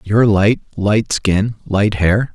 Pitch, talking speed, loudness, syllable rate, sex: 105 Hz, 155 wpm, -16 LUFS, 3.5 syllables/s, male